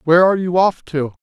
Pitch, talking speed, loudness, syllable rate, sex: 165 Hz, 245 wpm, -16 LUFS, 6.8 syllables/s, male